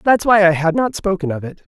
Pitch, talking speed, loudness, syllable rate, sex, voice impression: 205 Hz, 275 wpm, -16 LUFS, 5.8 syllables/s, female, very feminine, slightly young, thin, tensed, slightly powerful, bright, slightly soft, clear, fluent, slightly cool, slightly intellectual, refreshing, slightly sincere, slightly calm, friendly, reassuring, unique, slightly elegant, wild, lively, strict, slightly intense, sharp